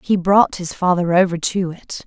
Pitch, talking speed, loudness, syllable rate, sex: 180 Hz, 205 wpm, -17 LUFS, 4.6 syllables/s, female